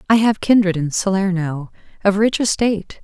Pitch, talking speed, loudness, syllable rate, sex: 195 Hz, 160 wpm, -17 LUFS, 5.2 syllables/s, female